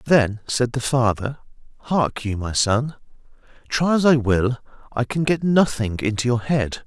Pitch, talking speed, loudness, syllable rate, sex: 125 Hz, 165 wpm, -21 LUFS, 4.3 syllables/s, male